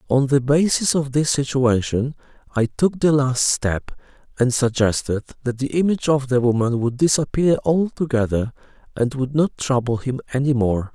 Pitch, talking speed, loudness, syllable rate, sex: 130 Hz, 160 wpm, -20 LUFS, 4.8 syllables/s, male